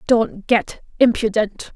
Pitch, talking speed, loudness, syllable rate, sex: 225 Hz, 100 wpm, -19 LUFS, 3.6 syllables/s, female